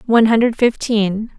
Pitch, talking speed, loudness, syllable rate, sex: 220 Hz, 130 wpm, -15 LUFS, 5.0 syllables/s, female